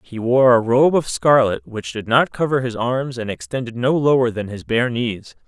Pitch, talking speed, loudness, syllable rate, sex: 120 Hz, 220 wpm, -18 LUFS, 4.7 syllables/s, male